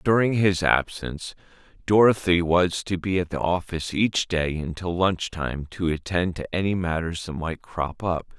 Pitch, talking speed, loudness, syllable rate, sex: 90 Hz, 170 wpm, -24 LUFS, 4.6 syllables/s, male